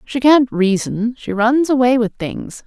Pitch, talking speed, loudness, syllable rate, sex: 240 Hz, 180 wpm, -16 LUFS, 3.9 syllables/s, female